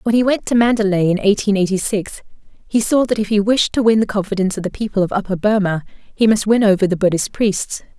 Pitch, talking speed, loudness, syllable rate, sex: 205 Hz, 240 wpm, -17 LUFS, 6.3 syllables/s, female